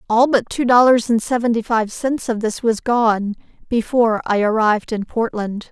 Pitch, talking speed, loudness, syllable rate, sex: 230 Hz, 180 wpm, -18 LUFS, 4.9 syllables/s, female